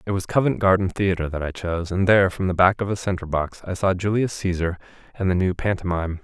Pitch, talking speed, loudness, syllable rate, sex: 95 Hz, 240 wpm, -22 LUFS, 6.3 syllables/s, male